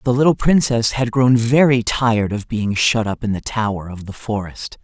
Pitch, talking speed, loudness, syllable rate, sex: 115 Hz, 210 wpm, -17 LUFS, 4.9 syllables/s, male